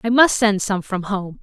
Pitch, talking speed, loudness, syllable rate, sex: 205 Hz, 255 wpm, -18 LUFS, 4.5 syllables/s, female